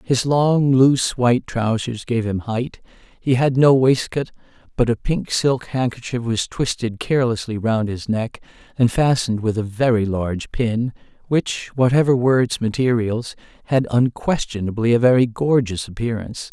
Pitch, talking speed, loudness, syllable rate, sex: 120 Hz, 150 wpm, -19 LUFS, 4.8 syllables/s, male